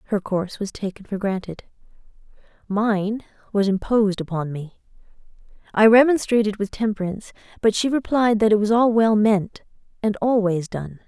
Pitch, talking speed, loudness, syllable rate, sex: 210 Hz, 145 wpm, -21 LUFS, 5.2 syllables/s, female